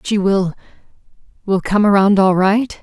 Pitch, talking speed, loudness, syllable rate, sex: 195 Hz, 125 wpm, -15 LUFS, 4.4 syllables/s, female